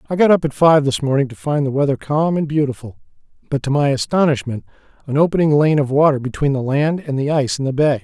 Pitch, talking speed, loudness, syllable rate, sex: 140 Hz, 240 wpm, -17 LUFS, 6.3 syllables/s, male